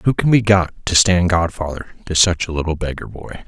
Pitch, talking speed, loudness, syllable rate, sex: 90 Hz, 225 wpm, -17 LUFS, 5.2 syllables/s, male